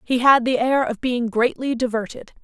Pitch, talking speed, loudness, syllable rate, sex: 245 Hz, 195 wpm, -20 LUFS, 4.9 syllables/s, female